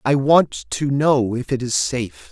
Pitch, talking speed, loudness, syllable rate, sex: 130 Hz, 205 wpm, -19 LUFS, 4.1 syllables/s, male